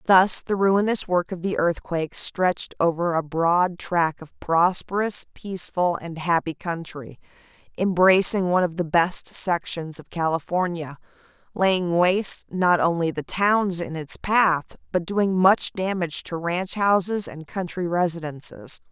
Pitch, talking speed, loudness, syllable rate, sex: 175 Hz, 145 wpm, -22 LUFS, 4.2 syllables/s, female